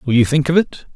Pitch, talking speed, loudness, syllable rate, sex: 140 Hz, 315 wpm, -15 LUFS, 6.0 syllables/s, male